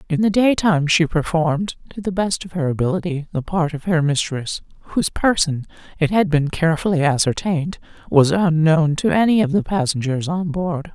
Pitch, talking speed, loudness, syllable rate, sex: 165 Hz, 170 wpm, -19 LUFS, 5.4 syllables/s, female